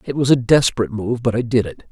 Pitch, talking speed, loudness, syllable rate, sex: 115 Hz, 280 wpm, -18 LUFS, 6.7 syllables/s, male